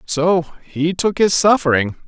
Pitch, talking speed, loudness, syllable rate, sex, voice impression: 165 Hz, 145 wpm, -16 LUFS, 3.9 syllables/s, male, masculine, adult-like, slightly middle-aged, slightly thick, slightly tensed, slightly weak, bright, slightly soft, clear, fluent, slightly cool, slightly intellectual, refreshing, sincere, calm, slightly friendly, slightly reassuring, slightly elegant, slightly lively, slightly kind, slightly modest